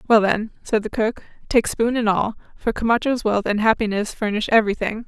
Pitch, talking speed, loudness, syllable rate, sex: 220 Hz, 190 wpm, -21 LUFS, 5.6 syllables/s, female